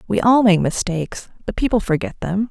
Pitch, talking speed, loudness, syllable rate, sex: 205 Hz, 190 wpm, -18 LUFS, 5.6 syllables/s, female